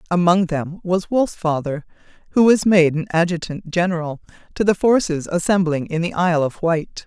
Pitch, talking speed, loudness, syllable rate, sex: 175 Hz, 160 wpm, -19 LUFS, 5.0 syllables/s, female